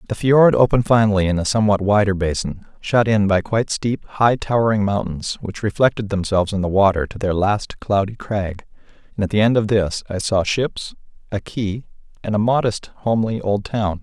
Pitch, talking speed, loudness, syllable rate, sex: 105 Hz, 190 wpm, -19 LUFS, 5.4 syllables/s, male